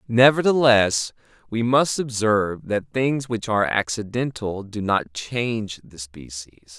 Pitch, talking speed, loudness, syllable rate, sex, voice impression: 110 Hz, 125 wpm, -21 LUFS, 4.0 syllables/s, male, masculine, adult-like, slightly thick, slightly cool, slightly unique